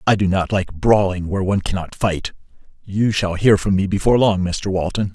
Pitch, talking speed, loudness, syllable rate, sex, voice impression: 95 Hz, 210 wpm, -19 LUFS, 5.5 syllables/s, male, masculine, middle-aged, slightly thick, slightly tensed, powerful, hard, slightly muffled, raspy, cool, calm, mature, wild, slightly lively, strict